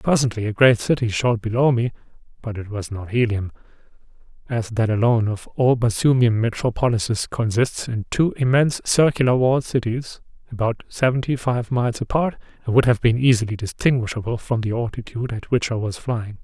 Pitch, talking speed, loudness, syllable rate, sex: 120 Hz, 165 wpm, -21 LUFS, 5.7 syllables/s, male